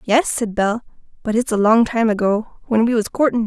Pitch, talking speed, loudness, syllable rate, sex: 225 Hz, 225 wpm, -18 LUFS, 5.3 syllables/s, female